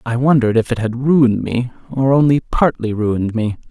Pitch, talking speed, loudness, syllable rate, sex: 125 Hz, 195 wpm, -16 LUFS, 5.5 syllables/s, male